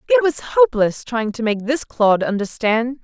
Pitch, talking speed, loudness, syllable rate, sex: 250 Hz, 180 wpm, -18 LUFS, 4.7 syllables/s, female